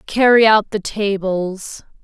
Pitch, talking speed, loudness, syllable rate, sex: 205 Hz, 120 wpm, -16 LUFS, 3.5 syllables/s, female